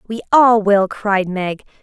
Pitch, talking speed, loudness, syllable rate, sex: 205 Hz, 165 wpm, -15 LUFS, 3.6 syllables/s, female